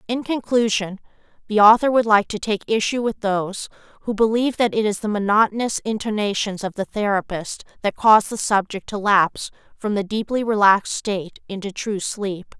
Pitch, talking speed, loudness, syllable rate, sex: 210 Hz, 170 wpm, -20 LUFS, 5.4 syllables/s, female